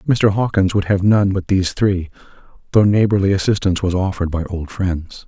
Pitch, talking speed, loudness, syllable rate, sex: 95 Hz, 180 wpm, -17 LUFS, 5.6 syllables/s, male